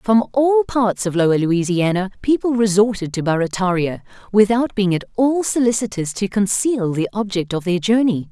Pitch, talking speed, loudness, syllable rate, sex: 205 Hz, 160 wpm, -18 LUFS, 5.0 syllables/s, female